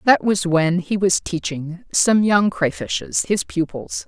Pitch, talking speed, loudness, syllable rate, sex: 150 Hz, 160 wpm, -19 LUFS, 3.9 syllables/s, female